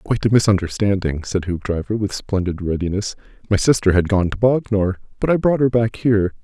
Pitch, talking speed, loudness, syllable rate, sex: 105 Hz, 185 wpm, -19 LUFS, 5.7 syllables/s, male